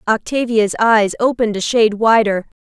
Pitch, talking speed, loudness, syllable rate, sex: 220 Hz, 135 wpm, -15 LUFS, 5.2 syllables/s, female